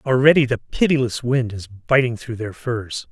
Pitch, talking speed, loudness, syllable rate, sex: 120 Hz, 175 wpm, -20 LUFS, 4.7 syllables/s, male